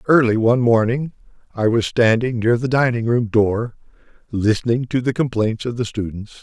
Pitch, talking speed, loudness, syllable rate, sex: 115 Hz, 170 wpm, -18 LUFS, 5.2 syllables/s, male